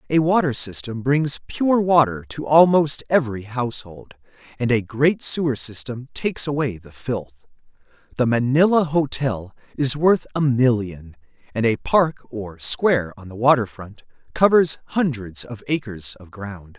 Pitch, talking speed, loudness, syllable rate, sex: 125 Hz, 145 wpm, -20 LUFS, 4.4 syllables/s, male